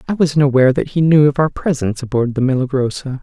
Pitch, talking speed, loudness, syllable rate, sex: 140 Hz, 225 wpm, -15 LUFS, 6.5 syllables/s, male